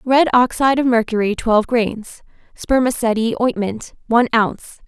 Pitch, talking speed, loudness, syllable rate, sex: 235 Hz, 125 wpm, -17 LUFS, 5.1 syllables/s, female